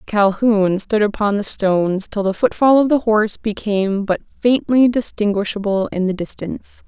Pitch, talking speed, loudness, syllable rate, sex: 210 Hz, 155 wpm, -17 LUFS, 4.9 syllables/s, female